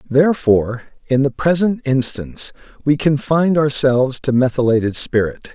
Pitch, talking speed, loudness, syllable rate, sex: 135 Hz, 120 wpm, -17 LUFS, 5.1 syllables/s, male